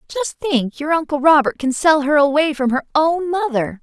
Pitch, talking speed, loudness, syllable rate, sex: 295 Hz, 205 wpm, -17 LUFS, 5.3 syllables/s, female